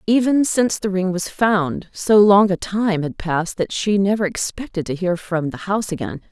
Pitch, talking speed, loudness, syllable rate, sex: 190 Hz, 210 wpm, -19 LUFS, 4.9 syllables/s, female